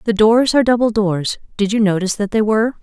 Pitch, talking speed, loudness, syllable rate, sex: 215 Hz, 235 wpm, -16 LUFS, 6.5 syllables/s, female